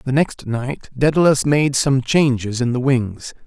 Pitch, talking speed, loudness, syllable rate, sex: 135 Hz, 175 wpm, -18 LUFS, 4.1 syllables/s, male